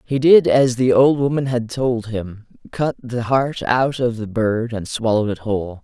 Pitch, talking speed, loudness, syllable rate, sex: 120 Hz, 205 wpm, -18 LUFS, 4.4 syllables/s, male